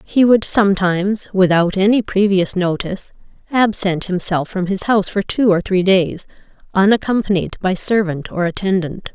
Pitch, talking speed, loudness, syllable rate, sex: 195 Hz, 145 wpm, -16 LUFS, 4.9 syllables/s, female